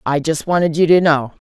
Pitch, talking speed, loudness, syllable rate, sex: 160 Hz, 245 wpm, -15 LUFS, 5.6 syllables/s, female